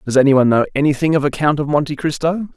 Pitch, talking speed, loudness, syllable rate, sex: 145 Hz, 260 wpm, -16 LUFS, 7.4 syllables/s, male